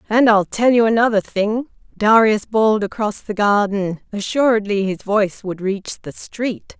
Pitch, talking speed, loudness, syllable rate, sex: 210 Hz, 160 wpm, -18 LUFS, 4.6 syllables/s, female